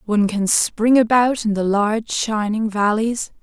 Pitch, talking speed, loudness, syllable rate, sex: 220 Hz, 160 wpm, -18 LUFS, 4.2 syllables/s, female